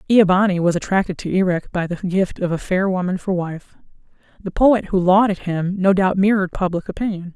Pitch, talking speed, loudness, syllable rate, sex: 185 Hz, 205 wpm, -19 LUFS, 5.6 syllables/s, female